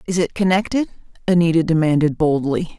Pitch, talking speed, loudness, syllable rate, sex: 170 Hz, 130 wpm, -18 LUFS, 5.8 syllables/s, female